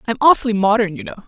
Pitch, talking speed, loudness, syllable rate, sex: 215 Hz, 235 wpm, -16 LUFS, 7.6 syllables/s, female